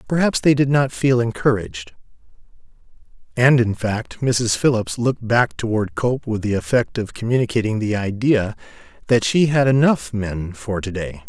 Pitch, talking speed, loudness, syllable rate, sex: 115 Hz, 160 wpm, -19 LUFS, 4.8 syllables/s, male